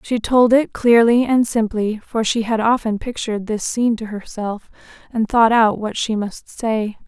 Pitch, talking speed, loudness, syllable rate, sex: 225 Hz, 185 wpm, -18 LUFS, 4.5 syllables/s, female